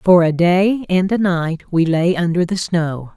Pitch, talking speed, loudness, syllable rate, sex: 175 Hz, 210 wpm, -16 LUFS, 4.0 syllables/s, female